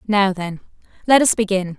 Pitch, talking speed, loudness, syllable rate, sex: 200 Hz, 170 wpm, -17 LUFS, 4.9 syllables/s, female